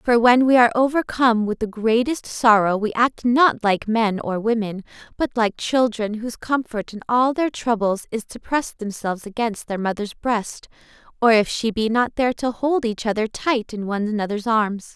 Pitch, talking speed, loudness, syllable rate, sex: 230 Hz, 195 wpm, -20 LUFS, 5.0 syllables/s, female